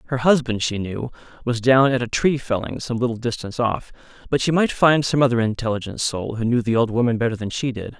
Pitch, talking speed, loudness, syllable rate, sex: 120 Hz, 235 wpm, -21 LUFS, 6.0 syllables/s, male